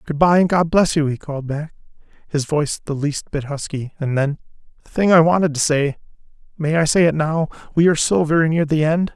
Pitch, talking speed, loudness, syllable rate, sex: 155 Hz, 210 wpm, -18 LUFS, 5.9 syllables/s, male